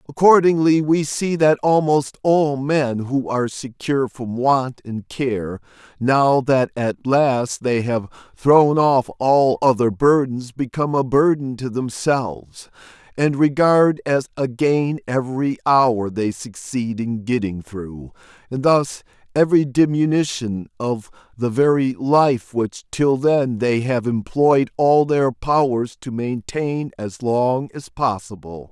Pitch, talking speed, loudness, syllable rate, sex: 130 Hz, 135 wpm, -19 LUFS, 3.7 syllables/s, male